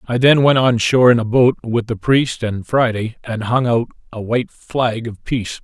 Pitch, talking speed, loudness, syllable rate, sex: 120 Hz, 225 wpm, -16 LUFS, 4.8 syllables/s, male